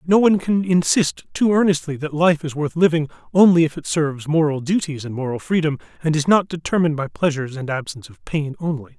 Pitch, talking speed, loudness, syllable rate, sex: 160 Hz, 205 wpm, -19 LUFS, 6.1 syllables/s, male